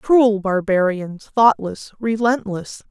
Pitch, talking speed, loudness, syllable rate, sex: 210 Hz, 85 wpm, -18 LUFS, 3.3 syllables/s, female